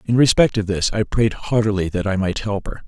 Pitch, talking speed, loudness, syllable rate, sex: 105 Hz, 250 wpm, -19 LUFS, 5.6 syllables/s, male